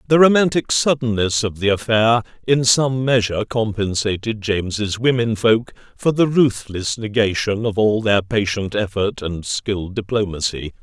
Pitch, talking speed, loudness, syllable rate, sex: 110 Hz, 140 wpm, -18 LUFS, 4.6 syllables/s, male